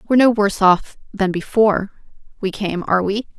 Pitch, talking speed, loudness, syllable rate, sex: 200 Hz, 175 wpm, -18 LUFS, 6.1 syllables/s, female